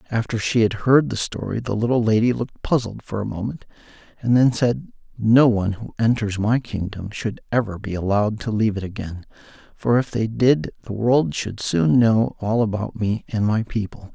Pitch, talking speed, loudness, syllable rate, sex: 110 Hz, 195 wpm, -21 LUFS, 5.1 syllables/s, male